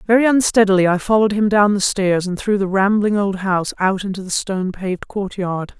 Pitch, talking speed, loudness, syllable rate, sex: 195 Hz, 205 wpm, -17 LUFS, 5.7 syllables/s, female